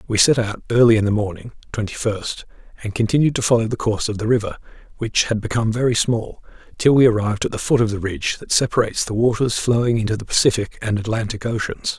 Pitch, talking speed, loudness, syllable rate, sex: 110 Hz, 215 wpm, -19 LUFS, 6.5 syllables/s, male